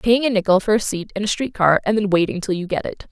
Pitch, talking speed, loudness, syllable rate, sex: 205 Hz, 325 wpm, -19 LUFS, 6.4 syllables/s, female